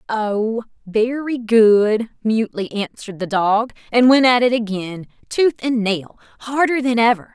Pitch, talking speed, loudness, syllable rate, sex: 225 Hz, 145 wpm, -18 LUFS, 4.2 syllables/s, female